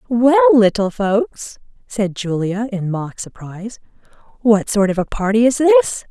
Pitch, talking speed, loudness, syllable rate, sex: 220 Hz, 145 wpm, -16 LUFS, 4.2 syllables/s, female